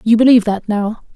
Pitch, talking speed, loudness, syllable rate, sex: 220 Hz, 205 wpm, -14 LUFS, 6.2 syllables/s, female